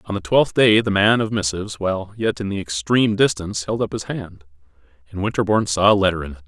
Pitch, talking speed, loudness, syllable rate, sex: 100 Hz, 230 wpm, -19 LUFS, 6.5 syllables/s, male